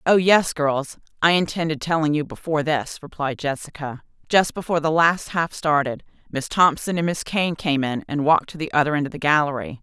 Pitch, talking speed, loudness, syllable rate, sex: 155 Hz, 200 wpm, -21 LUFS, 5.5 syllables/s, female